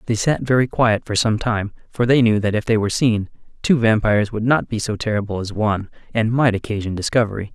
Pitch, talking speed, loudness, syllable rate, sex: 110 Hz, 225 wpm, -19 LUFS, 6.0 syllables/s, male